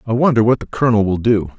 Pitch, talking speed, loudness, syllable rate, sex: 110 Hz, 265 wpm, -15 LUFS, 6.9 syllables/s, male